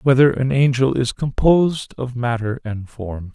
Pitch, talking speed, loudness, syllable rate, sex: 125 Hz, 160 wpm, -19 LUFS, 4.4 syllables/s, male